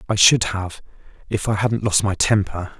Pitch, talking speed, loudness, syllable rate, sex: 100 Hz, 195 wpm, -19 LUFS, 4.8 syllables/s, male